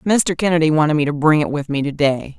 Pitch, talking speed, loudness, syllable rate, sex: 155 Hz, 275 wpm, -17 LUFS, 6.0 syllables/s, female